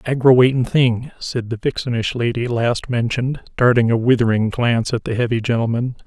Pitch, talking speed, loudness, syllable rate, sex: 120 Hz, 160 wpm, -18 LUFS, 5.4 syllables/s, male